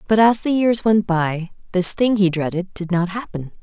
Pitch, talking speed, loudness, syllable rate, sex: 195 Hz, 215 wpm, -18 LUFS, 4.7 syllables/s, female